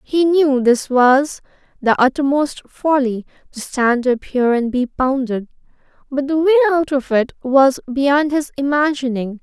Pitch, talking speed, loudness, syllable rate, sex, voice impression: 270 Hz, 155 wpm, -17 LUFS, 4.2 syllables/s, female, feminine, slightly young, tensed, slightly powerful, bright, soft, halting, cute, calm, friendly, sweet, slightly lively, slightly kind, modest